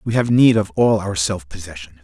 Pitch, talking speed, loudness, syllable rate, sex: 95 Hz, 235 wpm, -17 LUFS, 5.5 syllables/s, male